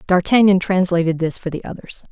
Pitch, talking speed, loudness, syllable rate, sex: 180 Hz, 170 wpm, -17 LUFS, 5.7 syllables/s, female